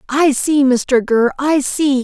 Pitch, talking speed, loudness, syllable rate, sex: 270 Hz, 175 wpm, -15 LUFS, 3.4 syllables/s, female